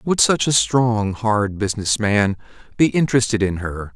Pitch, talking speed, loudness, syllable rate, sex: 110 Hz, 165 wpm, -18 LUFS, 4.6 syllables/s, male